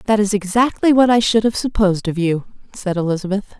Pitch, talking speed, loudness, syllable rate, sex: 205 Hz, 200 wpm, -17 LUFS, 6.0 syllables/s, female